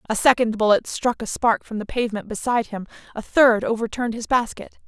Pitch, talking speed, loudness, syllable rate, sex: 230 Hz, 185 wpm, -21 LUFS, 6.0 syllables/s, female